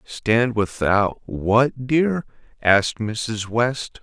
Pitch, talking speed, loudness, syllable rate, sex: 115 Hz, 105 wpm, -20 LUFS, 2.6 syllables/s, male